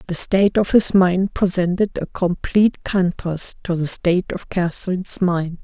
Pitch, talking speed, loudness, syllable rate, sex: 180 Hz, 160 wpm, -19 LUFS, 4.7 syllables/s, female